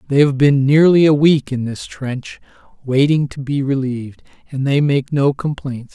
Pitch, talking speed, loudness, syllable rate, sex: 140 Hz, 180 wpm, -16 LUFS, 4.6 syllables/s, male